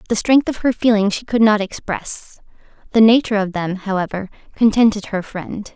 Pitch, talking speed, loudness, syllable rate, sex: 210 Hz, 175 wpm, -17 LUFS, 5.3 syllables/s, female